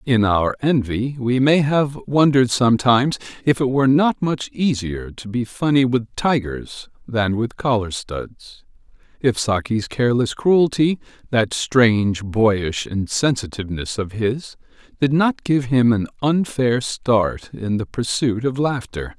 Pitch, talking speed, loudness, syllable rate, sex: 125 Hz, 140 wpm, -19 LUFS, 4.1 syllables/s, male